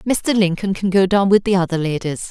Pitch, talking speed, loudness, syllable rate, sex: 190 Hz, 235 wpm, -17 LUFS, 5.3 syllables/s, female